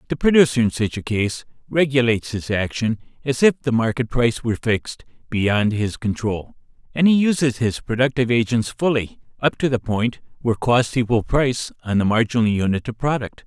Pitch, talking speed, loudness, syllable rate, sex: 120 Hz, 180 wpm, -20 LUFS, 5.5 syllables/s, male